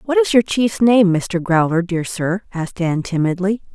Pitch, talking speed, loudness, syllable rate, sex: 195 Hz, 190 wpm, -17 LUFS, 4.6 syllables/s, female